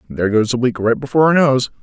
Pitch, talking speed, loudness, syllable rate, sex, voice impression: 125 Hz, 260 wpm, -15 LUFS, 7.0 syllables/s, male, very masculine, middle-aged, very thick, slightly relaxed, powerful, slightly bright, slightly hard, soft, clear, fluent, slightly raspy, cool, intellectual, slightly refreshing, sincere, calm, very mature, very friendly, very reassuring, very unique, elegant, wild, sweet, lively, kind, slightly intense, slightly modest